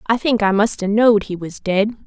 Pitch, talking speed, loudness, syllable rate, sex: 210 Hz, 260 wpm, -17 LUFS, 5.4 syllables/s, female